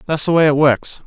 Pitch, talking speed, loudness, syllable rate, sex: 150 Hz, 280 wpm, -14 LUFS, 5.7 syllables/s, male